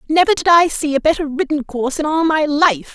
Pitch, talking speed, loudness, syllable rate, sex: 300 Hz, 245 wpm, -16 LUFS, 5.8 syllables/s, female